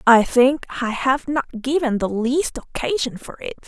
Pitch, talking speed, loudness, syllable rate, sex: 260 Hz, 180 wpm, -20 LUFS, 4.5 syllables/s, female